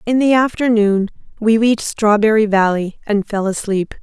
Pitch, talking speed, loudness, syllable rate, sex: 215 Hz, 150 wpm, -15 LUFS, 4.8 syllables/s, female